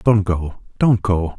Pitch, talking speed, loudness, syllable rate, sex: 95 Hz, 175 wpm, -18 LUFS, 3.4 syllables/s, male